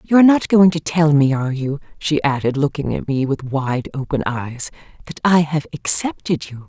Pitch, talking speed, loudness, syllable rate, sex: 150 Hz, 205 wpm, -18 LUFS, 5.1 syllables/s, female